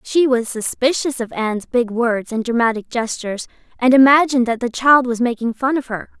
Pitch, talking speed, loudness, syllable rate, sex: 245 Hz, 195 wpm, -17 LUFS, 5.4 syllables/s, female